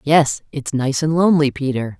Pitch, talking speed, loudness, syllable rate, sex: 140 Hz, 180 wpm, -18 LUFS, 5.0 syllables/s, female